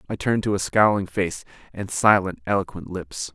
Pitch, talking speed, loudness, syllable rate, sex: 95 Hz, 180 wpm, -22 LUFS, 5.3 syllables/s, male